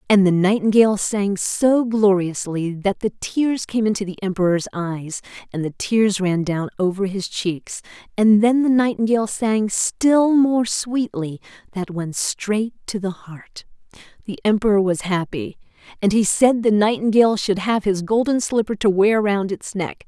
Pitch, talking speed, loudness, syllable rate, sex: 205 Hz, 165 wpm, -19 LUFS, 4.4 syllables/s, female